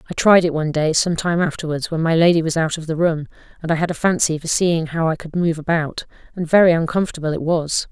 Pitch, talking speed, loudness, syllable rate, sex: 165 Hz, 250 wpm, -18 LUFS, 6.2 syllables/s, female